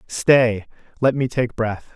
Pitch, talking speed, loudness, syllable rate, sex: 120 Hz, 155 wpm, -19 LUFS, 3.4 syllables/s, male